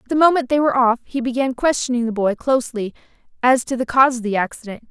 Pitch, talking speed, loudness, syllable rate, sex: 250 Hz, 220 wpm, -18 LUFS, 6.7 syllables/s, female